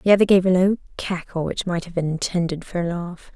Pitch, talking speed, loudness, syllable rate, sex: 180 Hz, 250 wpm, -21 LUFS, 6.0 syllables/s, female